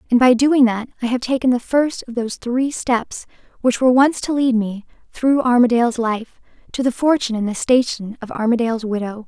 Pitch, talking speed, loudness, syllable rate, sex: 245 Hz, 200 wpm, -18 LUFS, 5.6 syllables/s, female